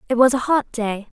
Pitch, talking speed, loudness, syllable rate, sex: 240 Hz, 255 wpm, -19 LUFS, 5.5 syllables/s, female